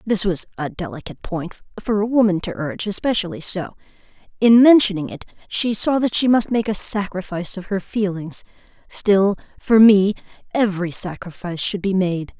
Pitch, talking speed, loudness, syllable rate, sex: 195 Hz, 160 wpm, -19 LUFS, 5.4 syllables/s, female